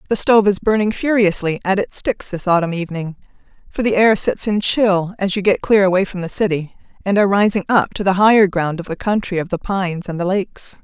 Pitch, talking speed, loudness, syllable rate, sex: 195 Hz, 235 wpm, -17 LUFS, 5.9 syllables/s, female